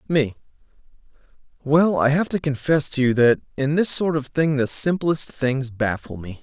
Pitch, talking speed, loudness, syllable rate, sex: 140 Hz, 175 wpm, -20 LUFS, 4.6 syllables/s, male